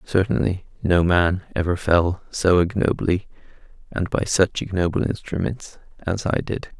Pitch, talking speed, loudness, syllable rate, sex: 90 Hz, 135 wpm, -22 LUFS, 4.3 syllables/s, male